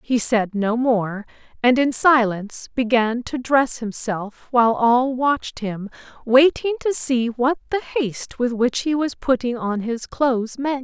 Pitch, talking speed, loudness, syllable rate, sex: 245 Hz, 165 wpm, -20 LUFS, 4.2 syllables/s, female